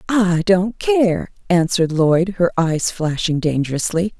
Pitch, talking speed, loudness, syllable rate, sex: 180 Hz, 130 wpm, -18 LUFS, 4.0 syllables/s, female